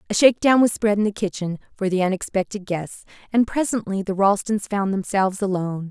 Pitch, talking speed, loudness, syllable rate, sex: 200 Hz, 185 wpm, -21 LUFS, 5.8 syllables/s, female